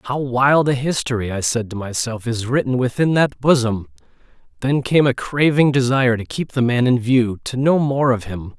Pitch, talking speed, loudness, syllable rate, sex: 125 Hz, 195 wpm, -18 LUFS, 4.9 syllables/s, male